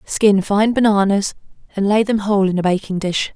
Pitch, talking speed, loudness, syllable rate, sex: 200 Hz, 195 wpm, -17 LUFS, 5.3 syllables/s, female